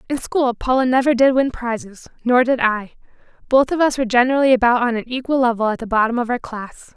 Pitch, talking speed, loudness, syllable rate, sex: 245 Hz, 215 wpm, -18 LUFS, 6.1 syllables/s, female